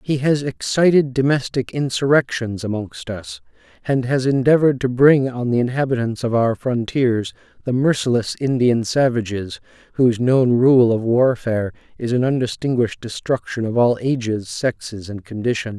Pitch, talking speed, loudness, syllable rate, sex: 120 Hz, 140 wpm, -19 LUFS, 4.9 syllables/s, male